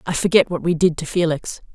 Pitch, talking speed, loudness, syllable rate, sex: 165 Hz, 240 wpm, -19 LUFS, 5.9 syllables/s, female